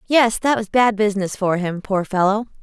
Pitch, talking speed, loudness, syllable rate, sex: 210 Hz, 205 wpm, -19 LUFS, 5.1 syllables/s, female